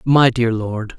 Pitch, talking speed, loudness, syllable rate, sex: 120 Hz, 185 wpm, -17 LUFS, 3.4 syllables/s, male